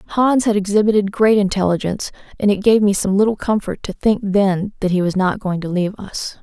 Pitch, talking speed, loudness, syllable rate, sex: 200 Hz, 215 wpm, -17 LUFS, 5.5 syllables/s, female